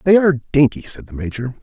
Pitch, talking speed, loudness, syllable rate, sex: 135 Hz, 220 wpm, -17 LUFS, 6.1 syllables/s, male